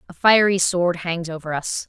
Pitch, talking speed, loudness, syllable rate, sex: 175 Hz, 190 wpm, -19 LUFS, 4.7 syllables/s, female